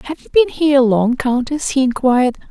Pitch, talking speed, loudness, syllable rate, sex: 265 Hz, 190 wpm, -15 LUFS, 5.3 syllables/s, female